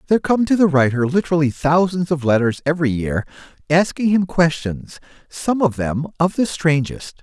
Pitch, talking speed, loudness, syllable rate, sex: 160 Hz, 165 wpm, -18 LUFS, 5.2 syllables/s, male